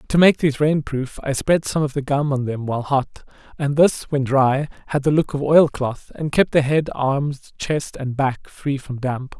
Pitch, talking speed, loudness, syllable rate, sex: 140 Hz, 230 wpm, -20 LUFS, 4.6 syllables/s, male